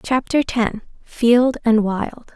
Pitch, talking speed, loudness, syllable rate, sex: 235 Hz, 100 wpm, -18 LUFS, 3.0 syllables/s, female